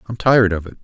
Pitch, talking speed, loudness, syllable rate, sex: 105 Hz, 285 wpm, -16 LUFS, 7.1 syllables/s, male